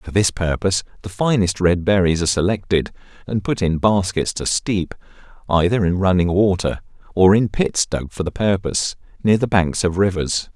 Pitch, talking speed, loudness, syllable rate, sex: 95 Hz, 175 wpm, -19 LUFS, 5.1 syllables/s, male